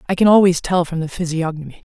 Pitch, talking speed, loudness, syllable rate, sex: 170 Hz, 220 wpm, -17 LUFS, 6.6 syllables/s, female